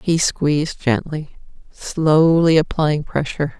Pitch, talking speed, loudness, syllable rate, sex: 150 Hz, 100 wpm, -18 LUFS, 3.8 syllables/s, female